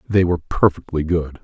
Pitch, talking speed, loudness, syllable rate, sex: 85 Hz, 165 wpm, -19 LUFS, 5.7 syllables/s, male